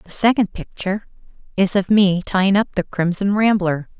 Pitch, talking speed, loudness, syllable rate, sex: 195 Hz, 165 wpm, -18 LUFS, 5.2 syllables/s, female